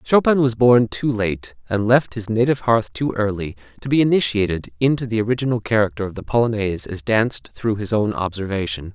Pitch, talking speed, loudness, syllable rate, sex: 110 Hz, 190 wpm, -20 LUFS, 5.7 syllables/s, male